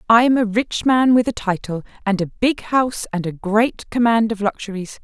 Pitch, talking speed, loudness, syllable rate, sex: 220 Hz, 215 wpm, -19 LUFS, 5.0 syllables/s, female